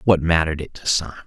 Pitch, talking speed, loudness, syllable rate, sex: 85 Hz, 240 wpm, -20 LUFS, 7.5 syllables/s, male